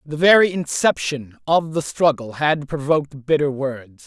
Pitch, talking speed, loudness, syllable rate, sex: 145 Hz, 150 wpm, -19 LUFS, 4.4 syllables/s, male